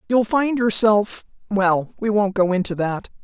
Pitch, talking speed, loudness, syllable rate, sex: 205 Hz, 150 wpm, -19 LUFS, 4.3 syllables/s, female